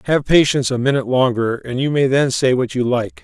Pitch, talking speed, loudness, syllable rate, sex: 130 Hz, 240 wpm, -17 LUFS, 5.9 syllables/s, male